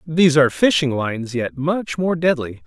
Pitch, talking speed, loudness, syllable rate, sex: 145 Hz, 180 wpm, -18 LUFS, 5.1 syllables/s, male